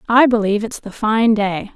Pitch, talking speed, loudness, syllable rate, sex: 220 Hz, 205 wpm, -17 LUFS, 5.1 syllables/s, female